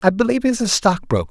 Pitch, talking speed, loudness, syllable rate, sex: 195 Hz, 230 wpm, -18 LUFS, 7.4 syllables/s, male